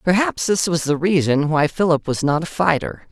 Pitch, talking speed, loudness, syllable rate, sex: 165 Hz, 210 wpm, -19 LUFS, 5.0 syllables/s, female